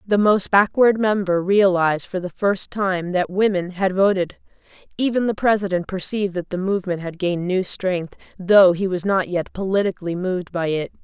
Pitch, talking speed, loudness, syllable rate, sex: 190 Hz, 180 wpm, -20 LUFS, 5.2 syllables/s, female